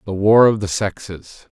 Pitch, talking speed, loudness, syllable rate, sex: 100 Hz, 190 wpm, -16 LUFS, 4.4 syllables/s, male